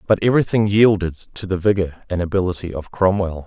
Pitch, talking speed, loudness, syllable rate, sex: 95 Hz, 175 wpm, -19 LUFS, 5.9 syllables/s, male